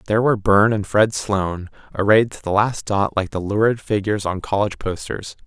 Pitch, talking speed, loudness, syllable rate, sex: 100 Hz, 195 wpm, -19 LUFS, 5.8 syllables/s, male